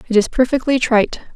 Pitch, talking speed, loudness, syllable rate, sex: 245 Hz, 175 wpm, -16 LUFS, 6.7 syllables/s, female